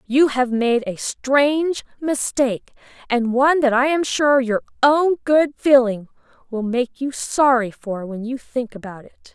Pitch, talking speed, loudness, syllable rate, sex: 255 Hz, 165 wpm, -19 LUFS, 4.1 syllables/s, female